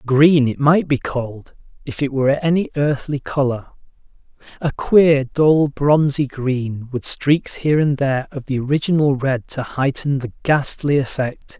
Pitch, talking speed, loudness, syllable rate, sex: 140 Hz, 150 wpm, -18 LUFS, 4.4 syllables/s, male